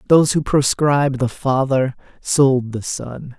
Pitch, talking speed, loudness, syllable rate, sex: 135 Hz, 140 wpm, -18 LUFS, 4.1 syllables/s, male